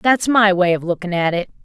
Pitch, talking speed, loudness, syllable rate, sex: 195 Hz, 255 wpm, -17 LUFS, 5.4 syllables/s, female